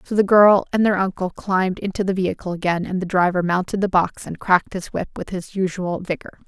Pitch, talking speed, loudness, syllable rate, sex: 185 Hz, 230 wpm, -20 LUFS, 5.8 syllables/s, female